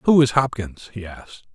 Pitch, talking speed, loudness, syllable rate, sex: 120 Hz, 195 wpm, -20 LUFS, 5.0 syllables/s, male